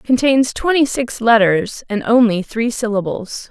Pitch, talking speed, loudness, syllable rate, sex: 230 Hz, 135 wpm, -16 LUFS, 4.1 syllables/s, female